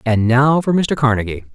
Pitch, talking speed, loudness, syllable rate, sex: 125 Hz, 195 wpm, -15 LUFS, 5.1 syllables/s, male